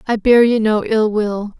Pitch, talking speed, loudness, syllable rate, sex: 215 Hz, 225 wpm, -15 LUFS, 4.2 syllables/s, female